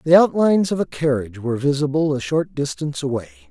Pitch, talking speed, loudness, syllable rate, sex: 150 Hz, 190 wpm, -20 LUFS, 6.6 syllables/s, male